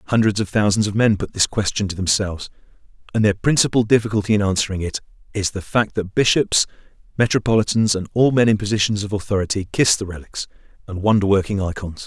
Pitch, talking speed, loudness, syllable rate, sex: 105 Hz, 185 wpm, -19 LUFS, 6.3 syllables/s, male